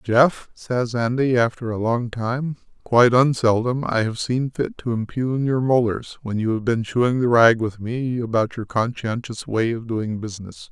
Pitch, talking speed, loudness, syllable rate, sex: 120 Hz, 185 wpm, -21 LUFS, 4.5 syllables/s, male